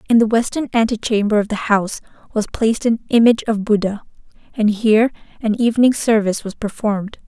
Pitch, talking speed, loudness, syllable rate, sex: 220 Hz, 165 wpm, -17 LUFS, 6.2 syllables/s, female